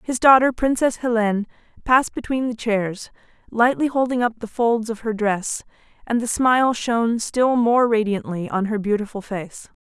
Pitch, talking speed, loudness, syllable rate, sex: 230 Hz, 165 wpm, -20 LUFS, 4.9 syllables/s, female